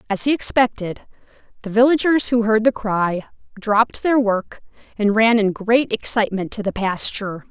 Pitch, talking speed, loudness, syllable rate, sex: 220 Hz, 160 wpm, -18 LUFS, 5.0 syllables/s, female